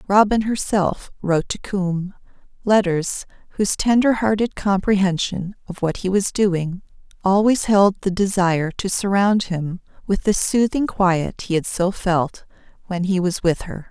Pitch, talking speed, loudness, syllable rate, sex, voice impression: 190 Hz, 145 wpm, -20 LUFS, 4.4 syllables/s, female, very feminine, very adult-like, very middle-aged, thin, tensed, slightly powerful, bright, hard, clear, fluent, slightly cute, cool, intellectual, refreshing, very sincere, calm, very friendly, very reassuring, unique, very elegant, slightly wild, sweet, slightly lively, strict, sharp